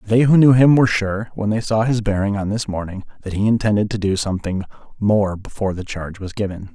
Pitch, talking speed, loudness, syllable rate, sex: 105 Hz, 230 wpm, -19 LUFS, 6.1 syllables/s, male